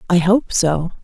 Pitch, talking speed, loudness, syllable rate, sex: 185 Hz, 175 wpm, -16 LUFS, 3.9 syllables/s, female